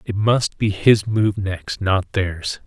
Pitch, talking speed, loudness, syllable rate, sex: 100 Hz, 160 wpm, -19 LUFS, 3.1 syllables/s, male